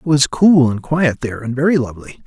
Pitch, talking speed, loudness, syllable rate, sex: 140 Hz, 240 wpm, -15 LUFS, 6.0 syllables/s, male